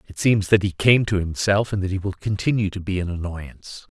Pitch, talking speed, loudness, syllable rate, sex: 95 Hz, 245 wpm, -21 LUFS, 5.6 syllables/s, male